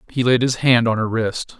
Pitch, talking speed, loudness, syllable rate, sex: 120 Hz, 265 wpm, -18 LUFS, 5.0 syllables/s, male